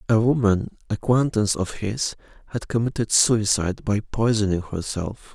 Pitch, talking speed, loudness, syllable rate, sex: 110 Hz, 125 wpm, -22 LUFS, 4.7 syllables/s, male